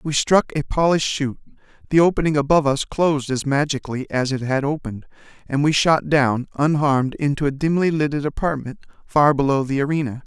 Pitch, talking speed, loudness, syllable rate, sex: 145 Hz, 175 wpm, -20 LUFS, 6.0 syllables/s, male